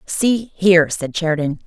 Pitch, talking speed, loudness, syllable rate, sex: 175 Hz, 145 wpm, -17 LUFS, 4.7 syllables/s, female